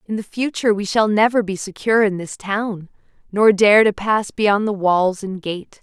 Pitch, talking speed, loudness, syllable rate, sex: 205 Hz, 205 wpm, -18 LUFS, 4.7 syllables/s, female